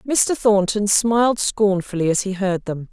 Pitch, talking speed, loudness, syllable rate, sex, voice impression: 205 Hz, 165 wpm, -19 LUFS, 4.4 syllables/s, female, feminine, adult-like, tensed, powerful, clear, fluent, slightly raspy, intellectual, calm, elegant, lively, slightly sharp